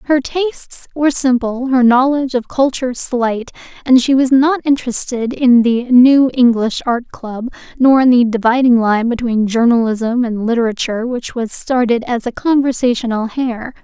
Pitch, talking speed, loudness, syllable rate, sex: 245 Hz, 155 wpm, -14 LUFS, 4.7 syllables/s, female